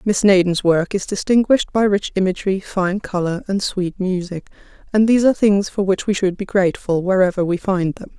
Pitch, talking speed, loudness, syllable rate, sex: 190 Hz, 200 wpm, -18 LUFS, 5.6 syllables/s, female